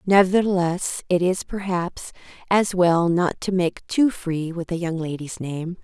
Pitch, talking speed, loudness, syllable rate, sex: 180 Hz, 165 wpm, -22 LUFS, 4.1 syllables/s, female